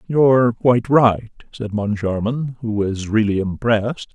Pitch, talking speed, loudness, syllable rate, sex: 115 Hz, 130 wpm, -18 LUFS, 4.5 syllables/s, male